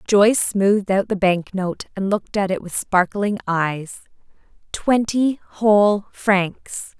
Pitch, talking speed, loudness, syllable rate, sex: 200 Hz, 135 wpm, -19 LUFS, 3.8 syllables/s, female